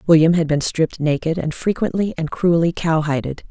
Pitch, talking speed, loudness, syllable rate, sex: 165 Hz, 170 wpm, -19 LUFS, 5.4 syllables/s, female